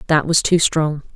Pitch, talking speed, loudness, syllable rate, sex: 155 Hz, 205 wpm, -17 LUFS, 4.7 syllables/s, female